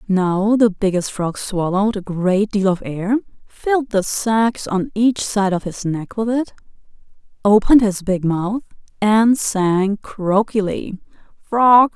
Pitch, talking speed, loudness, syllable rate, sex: 205 Hz, 145 wpm, -18 LUFS, 3.8 syllables/s, female